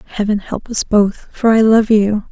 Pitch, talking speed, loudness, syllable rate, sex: 210 Hz, 210 wpm, -14 LUFS, 4.4 syllables/s, female